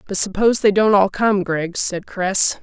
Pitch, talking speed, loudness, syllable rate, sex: 200 Hz, 205 wpm, -17 LUFS, 4.5 syllables/s, female